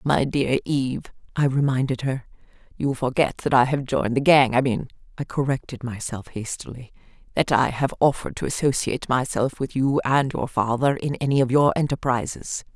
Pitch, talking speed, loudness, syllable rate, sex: 130 Hz, 170 wpm, -23 LUFS, 5.3 syllables/s, female